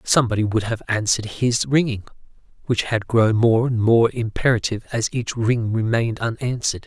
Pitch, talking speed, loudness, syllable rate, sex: 115 Hz, 155 wpm, -20 LUFS, 5.4 syllables/s, male